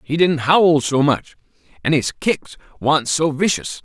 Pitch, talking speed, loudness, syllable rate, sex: 145 Hz, 170 wpm, -18 LUFS, 4.0 syllables/s, male